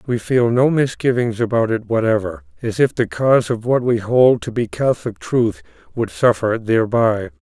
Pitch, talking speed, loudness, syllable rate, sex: 120 Hz, 175 wpm, -18 LUFS, 4.9 syllables/s, male